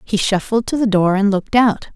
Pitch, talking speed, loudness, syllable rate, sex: 210 Hz, 245 wpm, -16 LUFS, 5.6 syllables/s, female